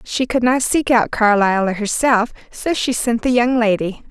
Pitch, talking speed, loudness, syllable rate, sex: 230 Hz, 190 wpm, -17 LUFS, 4.5 syllables/s, female